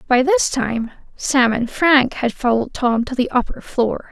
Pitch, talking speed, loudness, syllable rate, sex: 255 Hz, 190 wpm, -18 LUFS, 4.3 syllables/s, female